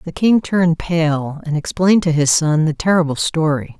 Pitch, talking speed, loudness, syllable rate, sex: 160 Hz, 190 wpm, -16 LUFS, 5.0 syllables/s, female